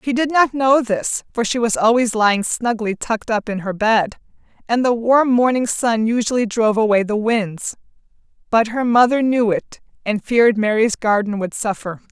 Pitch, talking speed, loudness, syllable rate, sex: 225 Hz, 185 wpm, -17 LUFS, 4.9 syllables/s, female